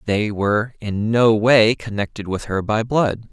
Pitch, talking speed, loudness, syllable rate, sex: 110 Hz, 180 wpm, -19 LUFS, 4.2 syllables/s, male